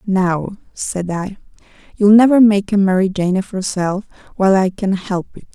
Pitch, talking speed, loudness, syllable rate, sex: 195 Hz, 175 wpm, -16 LUFS, 4.7 syllables/s, female